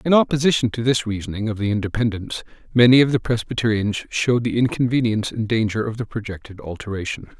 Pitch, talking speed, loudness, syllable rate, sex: 115 Hz, 170 wpm, -20 LUFS, 6.5 syllables/s, male